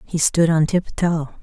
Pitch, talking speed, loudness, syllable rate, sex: 160 Hz, 170 wpm, -19 LUFS, 4.0 syllables/s, female